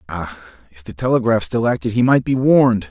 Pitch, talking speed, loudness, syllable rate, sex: 110 Hz, 205 wpm, -17 LUFS, 5.8 syllables/s, male